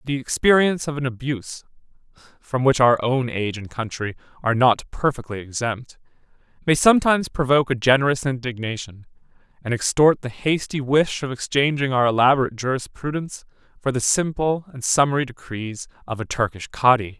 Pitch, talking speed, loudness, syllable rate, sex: 130 Hz, 145 wpm, -21 LUFS, 5.7 syllables/s, male